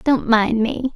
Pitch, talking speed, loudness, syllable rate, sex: 240 Hz, 190 wpm, -18 LUFS, 3.6 syllables/s, female